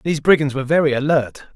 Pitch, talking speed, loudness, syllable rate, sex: 145 Hz, 195 wpm, -17 LUFS, 7.1 syllables/s, male